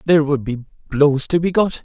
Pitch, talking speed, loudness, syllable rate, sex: 150 Hz, 230 wpm, -17 LUFS, 4.7 syllables/s, male